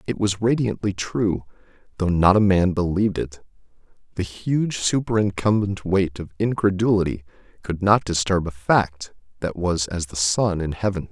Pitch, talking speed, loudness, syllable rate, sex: 95 Hz, 150 wpm, -22 LUFS, 4.6 syllables/s, male